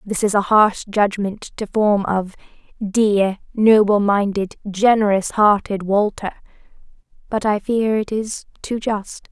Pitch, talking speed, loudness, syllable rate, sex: 205 Hz, 135 wpm, -18 LUFS, 3.8 syllables/s, female